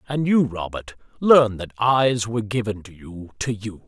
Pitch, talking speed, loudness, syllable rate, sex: 110 Hz, 185 wpm, -21 LUFS, 4.9 syllables/s, male